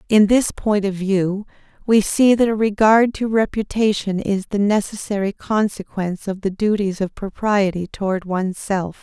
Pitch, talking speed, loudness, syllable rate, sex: 205 Hz, 160 wpm, -19 LUFS, 4.7 syllables/s, female